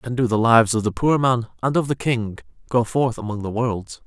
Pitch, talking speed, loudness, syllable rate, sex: 120 Hz, 250 wpm, -20 LUFS, 5.4 syllables/s, male